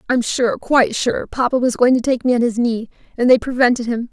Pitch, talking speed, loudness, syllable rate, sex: 245 Hz, 250 wpm, -17 LUFS, 5.8 syllables/s, female